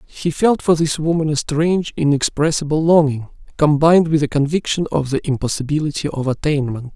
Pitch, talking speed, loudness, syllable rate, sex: 150 Hz, 155 wpm, -17 LUFS, 5.6 syllables/s, male